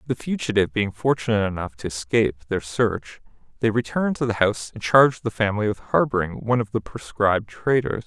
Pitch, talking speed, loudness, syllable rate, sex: 110 Hz, 185 wpm, -22 LUFS, 6.3 syllables/s, male